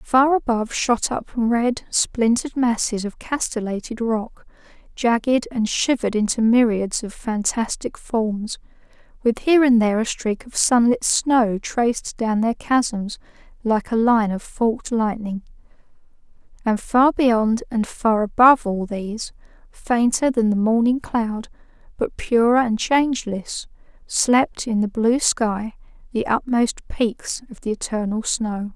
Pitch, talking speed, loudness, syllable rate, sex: 230 Hz, 140 wpm, -20 LUFS, 4.1 syllables/s, female